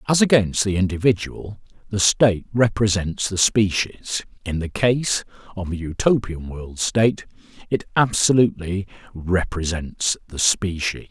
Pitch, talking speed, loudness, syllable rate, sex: 100 Hz, 120 wpm, -21 LUFS, 4.4 syllables/s, male